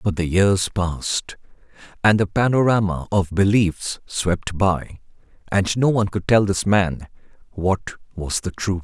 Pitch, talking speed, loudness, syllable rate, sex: 95 Hz, 150 wpm, -20 LUFS, 4.2 syllables/s, male